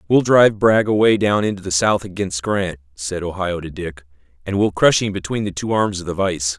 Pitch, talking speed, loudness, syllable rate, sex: 95 Hz, 230 wpm, -18 LUFS, 5.3 syllables/s, male